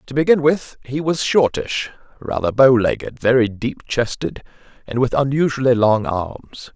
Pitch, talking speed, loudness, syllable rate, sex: 125 Hz, 150 wpm, -18 LUFS, 4.5 syllables/s, male